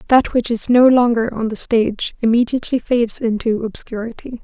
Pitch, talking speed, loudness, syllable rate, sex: 230 Hz, 160 wpm, -17 LUFS, 5.5 syllables/s, female